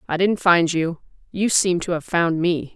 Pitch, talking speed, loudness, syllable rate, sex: 175 Hz, 220 wpm, -20 LUFS, 4.4 syllables/s, female